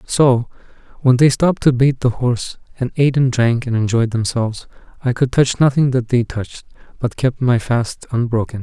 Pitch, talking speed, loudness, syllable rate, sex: 125 Hz, 190 wpm, -17 LUFS, 5.3 syllables/s, male